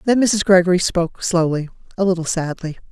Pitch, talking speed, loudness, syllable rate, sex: 180 Hz, 165 wpm, -18 LUFS, 5.9 syllables/s, female